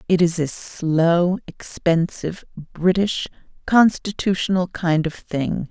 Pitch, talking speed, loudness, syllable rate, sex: 175 Hz, 105 wpm, -20 LUFS, 3.8 syllables/s, female